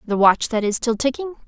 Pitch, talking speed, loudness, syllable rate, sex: 240 Hz, 245 wpm, -19 LUFS, 5.7 syllables/s, female